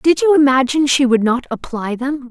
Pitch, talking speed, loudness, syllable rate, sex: 270 Hz, 210 wpm, -15 LUFS, 5.4 syllables/s, female